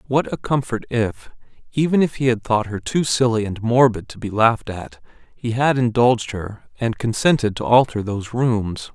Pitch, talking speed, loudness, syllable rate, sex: 115 Hz, 190 wpm, -20 LUFS, 4.9 syllables/s, male